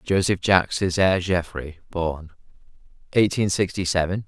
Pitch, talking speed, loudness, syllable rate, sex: 90 Hz, 110 wpm, -22 LUFS, 4.9 syllables/s, male